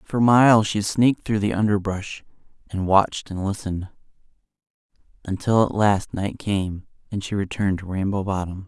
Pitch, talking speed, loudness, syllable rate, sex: 100 Hz, 150 wpm, -22 LUFS, 5.2 syllables/s, male